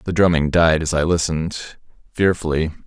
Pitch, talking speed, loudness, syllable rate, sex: 80 Hz, 125 wpm, -18 LUFS, 5.0 syllables/s, male